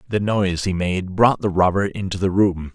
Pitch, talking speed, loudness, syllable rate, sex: 95 Hz, 220 wpm, -20 LUFS, 5.2 syllables/s, male